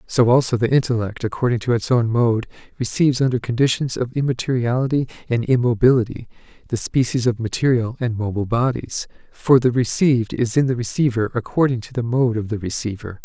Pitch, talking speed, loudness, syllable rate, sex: 120 Hz, 170 wpm, -20 LUFS, 5.9 syllables/s, male